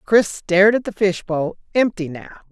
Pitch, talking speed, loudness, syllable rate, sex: 200 Hz, 165 wpm, -19 LUFS, 4.9 syllables/s, female